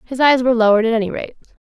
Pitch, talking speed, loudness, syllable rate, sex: 240 Hz, 260 wpm, -15 LUFS, 8.5 syllables/s, female